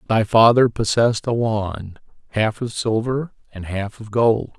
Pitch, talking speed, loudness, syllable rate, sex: 110 Hz, 155 wpm, -19 LUFS, 4.2 syllables/s, male